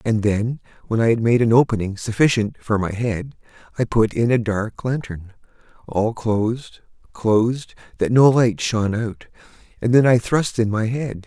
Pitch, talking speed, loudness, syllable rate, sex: 115 Hz, 175 wpm, -20 LUFS, 4.6 syllables/s, male